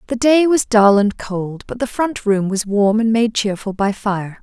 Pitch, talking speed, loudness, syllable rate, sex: 215 Hz, 230 wpm, -17 LUFS, 4.3 syllables/s, female